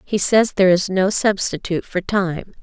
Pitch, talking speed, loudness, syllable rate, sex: 190 Hz, 185 wpm, -18 LUFS, 4.9 syllables/s, female